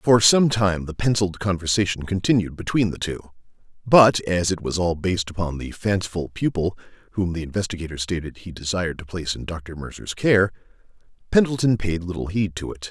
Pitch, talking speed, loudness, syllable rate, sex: 90 Hz, 175 wpm, -22 LUFS, 5.6 syllables/s, male